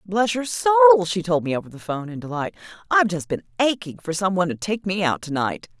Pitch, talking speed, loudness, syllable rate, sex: 175 Hz, 250 wpm, -21 LUFS, 6.3 syllables/s, female